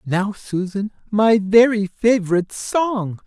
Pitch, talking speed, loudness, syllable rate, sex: 205 Hz, 110 wpm, -18 LUFS, 3.8 syllables/s, male